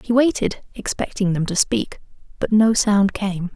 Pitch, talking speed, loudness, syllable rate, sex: 205 Hz, 170 wpm, -20 LUFS, 4.5 syllables/s, female